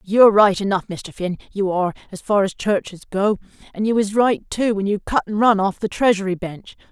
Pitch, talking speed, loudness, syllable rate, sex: 200 Hz, 225 wpm, -19 LUFS, 5.5 syllables/s, female